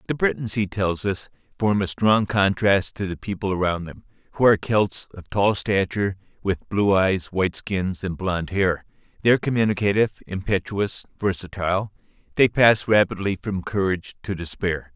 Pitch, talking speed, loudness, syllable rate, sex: 100 Hz, 160 wpm, -22 LUFS, 5.0 syllables/s, male